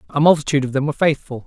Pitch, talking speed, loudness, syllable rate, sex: 145 Hz, 245 wpm, -18 LUFS, 8.5 syllables/s, male